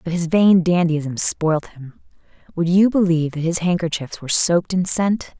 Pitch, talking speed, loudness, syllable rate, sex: 170 Hz, 180 wpm, -18 LUFS, 4.9 syllables/s, female